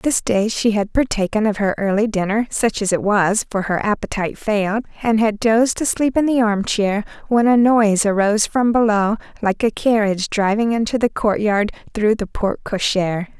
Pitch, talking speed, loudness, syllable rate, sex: 215 Hz, 180 wpm, -18 LUFS, 5.2 syllables/s, female